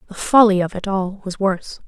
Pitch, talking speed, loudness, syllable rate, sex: 195 Hz, 225 wpm, -18 LUFS, 5.7 syllables/s, female